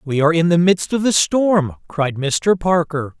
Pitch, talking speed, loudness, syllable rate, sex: 170 Hz, 205 wpm, -17 LUFS, 4.4 syllables/s, male